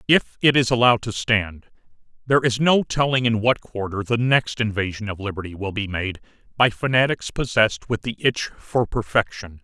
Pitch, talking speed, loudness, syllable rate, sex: 115 Hz, 180 wpm, -21 LUFS, 5.2 syllables/s, male